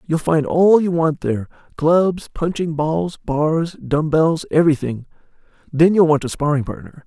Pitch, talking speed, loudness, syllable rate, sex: 155 Hz, 160 wpm, -18 LUFS, 4.5 syllables/s, male